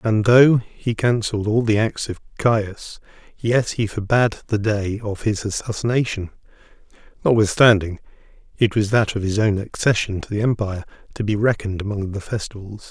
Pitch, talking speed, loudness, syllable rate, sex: 105 Hz, 160 wpm, -20 LUFS, 5.1 syllables/s, male